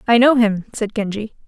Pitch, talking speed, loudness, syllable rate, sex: 220 Hz, 205 wpm, -17 LUFS, 5.5 syllables/s, female